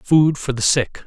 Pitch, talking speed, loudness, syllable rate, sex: 135 Hz, 225 wpm, -18 LUFS, 3.9 syllables/s, male